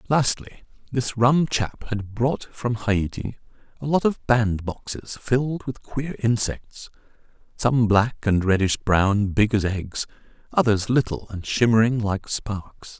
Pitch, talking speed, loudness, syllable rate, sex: 115 Hz, 135 wpm, -23 LUFS, 3.7 syllables/s, male